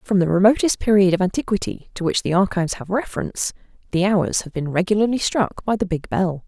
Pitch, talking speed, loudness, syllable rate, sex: 190 Hz, 205 wpm, -20 LUFS, 6.1 syllables/s, female